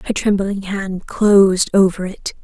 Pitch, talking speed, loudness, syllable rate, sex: 195 Hz, 150 wpm, -16 LUFS, 4.2 syllables/s, female